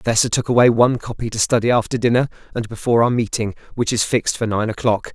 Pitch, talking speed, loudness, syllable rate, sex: 115 Hz, 235 wpm, -18 LUFS, 7.1 syllables/s, male